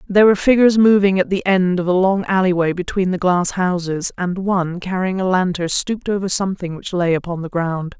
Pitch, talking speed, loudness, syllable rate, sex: 185 Hz, 210 wpm, -17 LUFS, 5.8 syllables/s, female